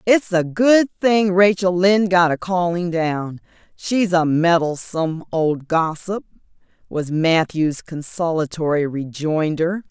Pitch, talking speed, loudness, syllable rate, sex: 170 Hz, 115 wpm, -19 LUFS, 3.8 syllables/s, female